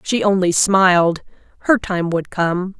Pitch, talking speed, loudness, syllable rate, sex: 185 Hz, 130 wpm, -16 LUFS, 4.1 syllables/s, female